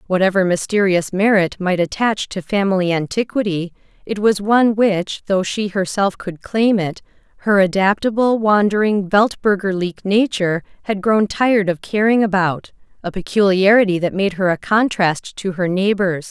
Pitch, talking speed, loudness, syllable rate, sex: 195 Hz, 140 wpm, -17 LUFS, 4.9 syllables/s, female